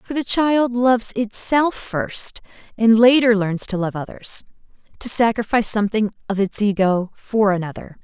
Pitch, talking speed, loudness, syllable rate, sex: 220 Hz, 150 wpm, -19 LUFS, 4.7 syllables/s, female